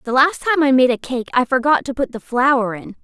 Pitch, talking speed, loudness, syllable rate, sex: 260 Hz, 275 wpm, -17 LUFS, 5.6 syllables/s, female